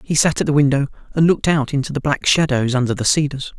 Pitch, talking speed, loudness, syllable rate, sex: 140 Hz, 250 wpm, -17 LUFS, 6.5 syllables/s, male